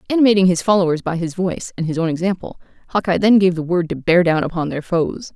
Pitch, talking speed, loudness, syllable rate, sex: 180 Hz, 235 wpm, -18 LUFS, 6.5 syllables/s, female